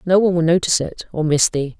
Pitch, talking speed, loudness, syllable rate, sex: 165 Hz, 265 wpm, -17 LUFS, 6.8 syllables/s, female